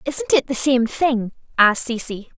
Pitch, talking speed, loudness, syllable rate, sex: 255 Hz, 175 wpm, -19 LUFS, 4.7 syllables/s, female